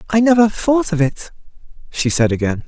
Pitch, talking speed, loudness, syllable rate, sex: 175 Hz, 180 wpm, -16 LUFS, 5.2 syllables/s, male